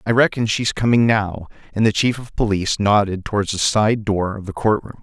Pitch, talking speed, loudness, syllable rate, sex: 105 Hz, 215 wpm, -19 LUFS, 5.5 syllables/s, male